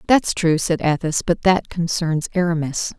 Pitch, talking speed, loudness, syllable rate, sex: 170 Hz, 160 wpm, -19 LUFS, 4.5 syllables/s, female